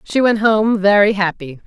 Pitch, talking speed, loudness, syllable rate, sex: 205 Hz, 180 wpm, -14 LUFS, 4.6 syllables/s, female